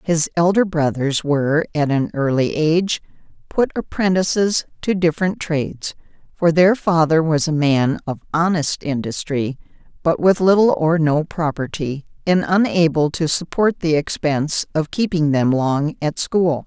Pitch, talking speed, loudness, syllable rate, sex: 160 Hz, 145 wpm, -18 LUFS, 4.4 syllables/s, female